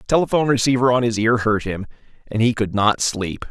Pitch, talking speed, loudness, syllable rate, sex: 115 Hz, 220 wpm, -19 LUFS, 5.8 syllables/s, male